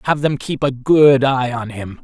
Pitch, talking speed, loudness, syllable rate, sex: 135 Hz, 235 wpm, -16 LUFS, 4.3 syllables/s, male